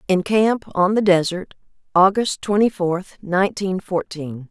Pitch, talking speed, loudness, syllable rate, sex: 190 Hz, 135 wpm, -19 LUFS, 4.1 syllables/s, female